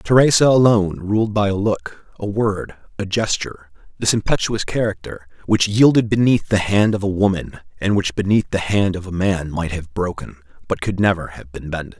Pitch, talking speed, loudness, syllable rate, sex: 100 Hz, 190 wpm, -18 LUFS, 5.1 syllables/s, male